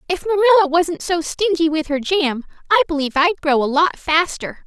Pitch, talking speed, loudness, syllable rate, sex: 330 Hz, 195 wpm, -17 LUFS, 5.1 syllables/s, female